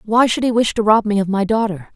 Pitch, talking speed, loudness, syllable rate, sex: 215 Hz, 305 wpm, -16 LUFS, 6.0 syllables/s, female